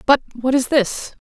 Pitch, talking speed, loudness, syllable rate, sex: 255 Hz, 195 wpm, -18 LUFS, 4.4 syllables/s, female